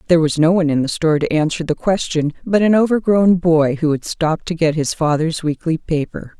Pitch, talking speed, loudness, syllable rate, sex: 165 Hz, 225 wpm, -17 LUFS, 5.8 syllables/s, female